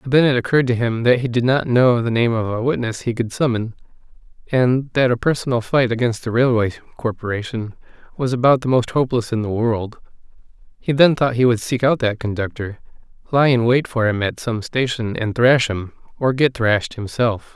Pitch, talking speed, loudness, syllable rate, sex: 120 Hz, 205 wpm, -19 LUFS, 5.4 syllables/s, male